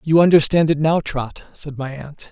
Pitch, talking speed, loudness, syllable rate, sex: 150 Hz, 210 wpm, -17 LUFS, 4.6 syllables/s, male